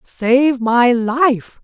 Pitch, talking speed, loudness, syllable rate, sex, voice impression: 250 Hz, 110 wpm, -14 LUFS, 2.0 syllables/s, female, very feminine, very adult-like, middle-aged, thin, tensed, powerful, bright, slightly hard, very clear, fluent, slightly raspy, slightly cute, cool, intellectual, refreshing, sincere, slightly calm, friendly, reassuring, unique, elegant, slightly wild, sweet, very lively, kind, slightly intense, light